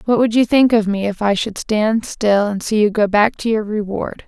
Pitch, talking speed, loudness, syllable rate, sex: 215 Hz, 265 wpm, -17 LUFS, 4.8 syllables/s, female